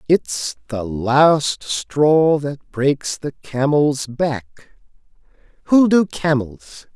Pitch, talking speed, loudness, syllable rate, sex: 140 Hz, 105 wpm, -18 LUFS, 2.7 syllables/s, male